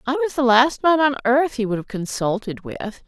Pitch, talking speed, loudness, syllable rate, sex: 250 Hz, 235 wpm, -19 LUFS, 5.0 syllables/s, female